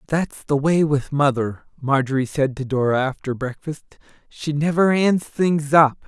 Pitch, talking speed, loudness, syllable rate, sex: 145 Hz, 160 wpm, -20 LUFS, 4.4 syllables/s, male